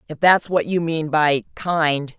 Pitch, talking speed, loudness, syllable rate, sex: 160 Hz, 190 wpm, -19 LUFS, 3.7 syllables/s, female